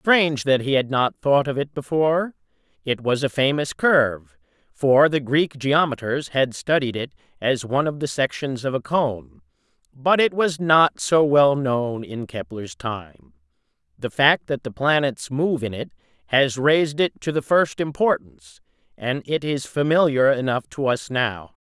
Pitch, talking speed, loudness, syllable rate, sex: 135 Hz, 170 wpm, -21 LUFS, 4.4 syllables/s, male